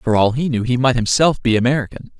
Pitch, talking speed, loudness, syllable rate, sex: 125 Hz, 245 wpm, -17 LUFS, 6.2 syllables/s, male